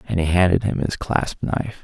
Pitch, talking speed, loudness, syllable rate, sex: 90 Hz, 230 wpm, -21 LUFS, 5.4 syllables/s, male